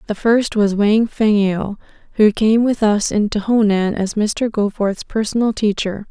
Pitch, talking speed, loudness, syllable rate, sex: 210 Hz, 165 wpm, -17 LUFS, 4.2 syllables/s, female